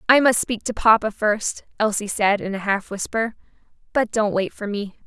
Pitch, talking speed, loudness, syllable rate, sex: 210 Hz, 200 wpm, -21 LUFS, 4.9 syllables/s, female